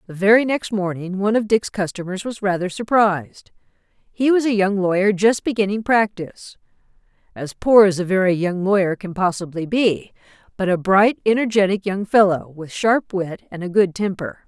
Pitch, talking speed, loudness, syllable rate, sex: 195 Hz, 170 wpm, -19 LUFS, 5.1 syllables/s, female